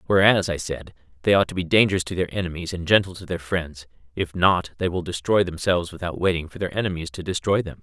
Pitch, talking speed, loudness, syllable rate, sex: 90 Hz, 230 wpm, -23 LUFS, 6.3 syllables/s, male